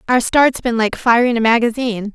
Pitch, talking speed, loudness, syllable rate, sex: 235 Hz, 195 wpm, -15 LUFS, 5.6 syllables/s, female